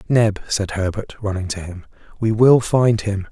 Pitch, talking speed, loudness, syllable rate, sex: 105 Hz, 180 wpm, -19 LUFS, 4.4 syllables/s, male